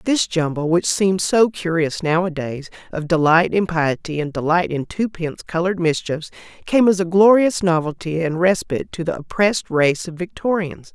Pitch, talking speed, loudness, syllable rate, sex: 170 Hz, 155 wpm, -19 LUFS, 5.0 syllables/s, female